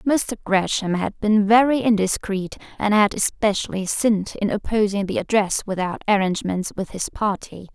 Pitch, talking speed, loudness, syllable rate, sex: 205 Hz, 145 wpm, -21 LUFS, 4.9 syllables/s, female